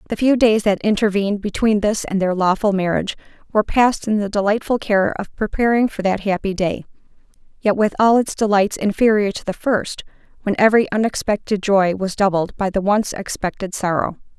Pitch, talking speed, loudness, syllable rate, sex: 205 Hz, 175 wpm, -18 LUFS, 5.5 syllables/s, female